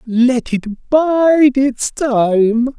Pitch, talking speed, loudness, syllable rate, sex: 255 Hz, 110 wpm, -14 LUFS, 1.9 syllables/s, male